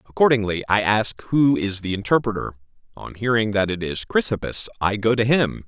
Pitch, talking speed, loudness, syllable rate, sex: 105 Hz, 180 wpm, -21 LUFS, 5.4 syllables/s, male